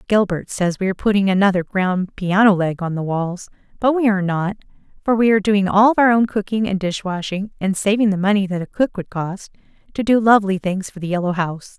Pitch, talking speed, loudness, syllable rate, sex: 195 Hz, 220 wpm, -18 LUFS, 5.8 syllables/s, female